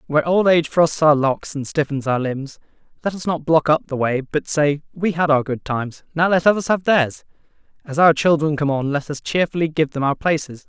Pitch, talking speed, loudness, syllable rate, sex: 155 Hz, 230 wpm, -19 LUFS, 5.3 syllables/s, male